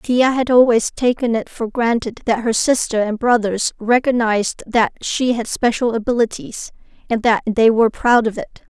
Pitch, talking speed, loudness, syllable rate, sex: 235 Hz, 170 wpm, -17 LUFS, 4.8 syllables/s, female